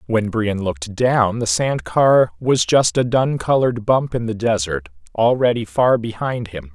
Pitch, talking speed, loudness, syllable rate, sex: 110 Hz, 180 wpm, -18 LUFS, 4.3 syllables/s, male